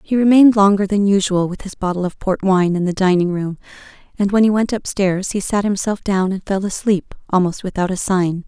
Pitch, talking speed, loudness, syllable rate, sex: 195 Hz, 220 wpm, -17 LUFS, 5.5 syllables/s, female